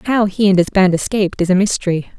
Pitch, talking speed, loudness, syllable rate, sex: 195 Hz, 245 wpm, -15 LUFS, 6.3 syllables/s, female